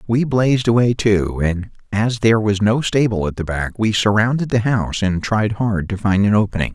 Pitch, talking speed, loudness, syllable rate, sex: 105 Hz, 215 wpm, -18 LUFS, 5.2 syllables/s, male